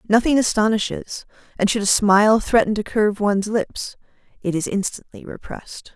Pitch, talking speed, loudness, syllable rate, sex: 210 Hz, 150 wpm, -19 LUFS, 5.4 syllables/s, female